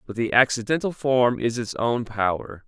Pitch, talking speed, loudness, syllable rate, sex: 120 Hz, 180 wpm, -23 LUFS, 4.7 syllables/s, male